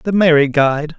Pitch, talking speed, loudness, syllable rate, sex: 155 Hz, 185 wpm, -13 LUFS, 5.9 syllables/s, male